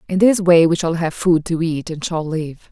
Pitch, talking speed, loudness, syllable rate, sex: 165 Hz, 265 wpm, -17 LUFS, 4.8 syllables/s, female